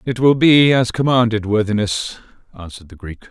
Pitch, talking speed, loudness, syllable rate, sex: 115 Hz, 165 wpm, -15 LUFS, 5.6 syllables/s, male